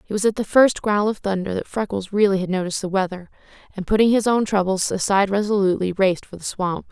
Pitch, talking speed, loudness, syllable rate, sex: 200 Hz, 225 wpm, -20 LUFS, 6.5 syllables/s, female